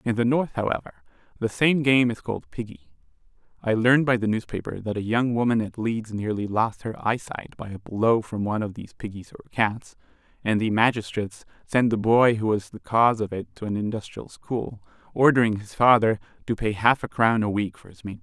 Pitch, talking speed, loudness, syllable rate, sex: 110 Hz, 215 wpm, -24 LUFS, 5.7 syllables/s, male